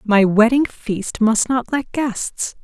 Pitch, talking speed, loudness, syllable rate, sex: 230 Hz, 160 wpm, -18 LUFS, 3.3 syllables/s, female